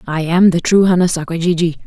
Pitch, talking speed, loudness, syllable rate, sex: 170 Hz, 225 wpm, -14 LUFS, 6.0 syllables/s, female